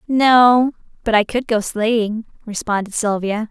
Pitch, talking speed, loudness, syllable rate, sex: 225 Hz, 135 wpm, -17 LUFS, 4.2 syllables/s, female